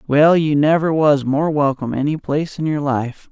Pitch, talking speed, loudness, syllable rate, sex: 145 Hz, 200 wpm, -17 LUFS, 5.1 syllables/s, male